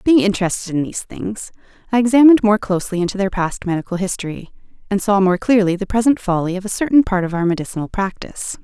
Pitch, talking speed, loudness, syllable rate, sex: 200 Hz, 200 wpm, -17 LUFS, 6.7 syllables/s, female